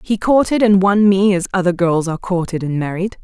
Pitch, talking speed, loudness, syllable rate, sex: 190 Hz, 220 wpm, -15 LUFS, 5.6 syllables/s, female